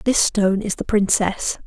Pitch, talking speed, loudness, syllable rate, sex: 205 Hz, 180 wpm, -19 LUFS, 4.7 syllables/s, female